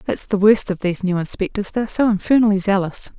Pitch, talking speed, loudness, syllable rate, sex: 200 Hz, 225 wpm, -18 LUFS, 6.7 syllables/s, female